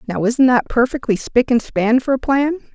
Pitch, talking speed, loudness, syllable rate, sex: 250 Hz, 220 wpm, -17 LUFS, 4.8 syllables/s, female